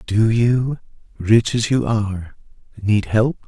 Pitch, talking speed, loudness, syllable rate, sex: 110 Hz, 140 wpm, -18 LUFS, 3.6 syllables/s, male